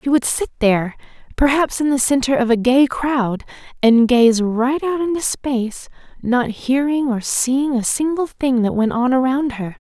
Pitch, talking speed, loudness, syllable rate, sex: 255 Hz, 180 wpm, -17 LUFS, 4.5 syllables/s, female